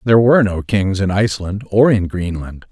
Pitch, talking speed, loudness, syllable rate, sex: 100 Hz, 200 wpm, -16 LUFS, 5.4 syllables/s, male